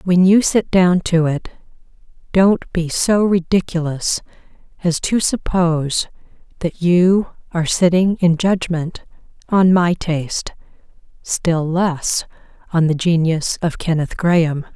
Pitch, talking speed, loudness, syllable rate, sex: 170 Hz, 120 wpm, -17 LUFS, 4.0 syllables/s, female